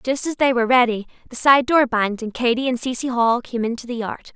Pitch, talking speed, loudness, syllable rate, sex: 245 Hz, 250 wpm, -19 LUFS, 5.9 syllables/s, female